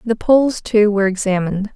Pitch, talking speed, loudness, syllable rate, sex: 210 Hz, 170 wpm, -16 LUFS, 6.1 syllables/s, female